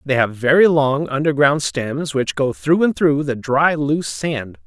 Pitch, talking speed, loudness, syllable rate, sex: 140 Hz, 195 wpm, -17 LUFS, 4.2 syllables/s, male